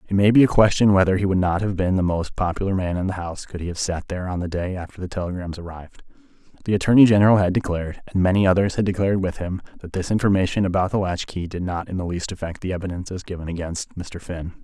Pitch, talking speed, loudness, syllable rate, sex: 90 Hz, 245 wpm, -22 LUFS, 6.9 syllables/s, male